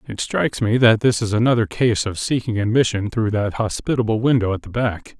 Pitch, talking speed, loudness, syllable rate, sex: 110 Hz, 210 wpm, -19 LUFS, 5.6 syllables/s, male